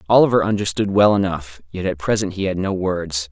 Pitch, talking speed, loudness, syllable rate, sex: 95 Hz, 200 wpm, -19 LUFS, 5.6 syllables/s, male